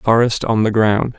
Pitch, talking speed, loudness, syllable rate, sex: 115 Hz, 250 wpm, -16 LUFS, 5.3 syllables/s, male